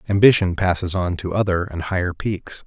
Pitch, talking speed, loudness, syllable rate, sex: 90 Hz, 180 wpm, -20 LUFS, 5.3 syllables/s, male